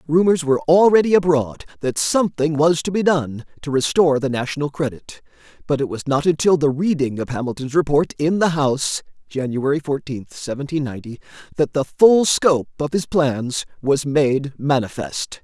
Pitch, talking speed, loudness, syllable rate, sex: 150 Hz, 165 wpm, -19 LUFS, 4.6 syllables/s, male